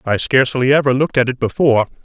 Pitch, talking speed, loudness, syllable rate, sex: 130 Hz, 205 wpm, -15 LUFS, 7.3 syllables/s, male